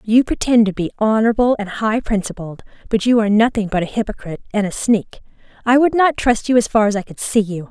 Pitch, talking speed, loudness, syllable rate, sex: 220 Hz, 235 wpm, -17 LUFS, 6.1 syllables/s, female